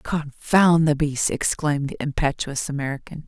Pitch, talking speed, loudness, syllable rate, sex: 150 Hz, 130 wpm, -22 LUFS, 4.7 syllables/s, female